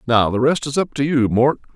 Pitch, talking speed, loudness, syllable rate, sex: 130 Hz, 275 wpm, -18 LUFS, 5.4 syllables/s, male